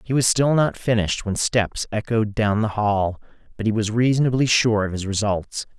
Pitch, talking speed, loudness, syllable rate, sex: 110 Hz, 195 wpm, -21 LUFS, 5.0 syllables/s, male